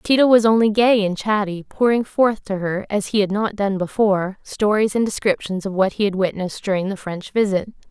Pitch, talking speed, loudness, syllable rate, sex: 205 Hz, 210 wpm, -19 LUFS, 5.5 syllables/s, female